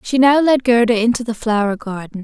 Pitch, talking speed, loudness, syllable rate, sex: 230 Hz, 215 wpm, -15 LUFS, 5.5 syllables/s, female